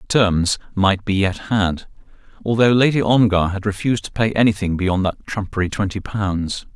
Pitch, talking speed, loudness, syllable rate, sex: 100 Hz, 160 wpm, -19 LUFS, 4.9 syllables/s, male